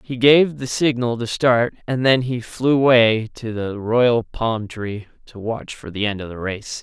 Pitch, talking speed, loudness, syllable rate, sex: 115 Hz, 210 wpm, -19 LUFS, 4.1 syllables/s, male